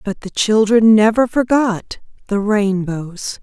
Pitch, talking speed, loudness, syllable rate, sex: 210 Hz, 125 wpm, -15 LUFS, 3.6 syllables/s, female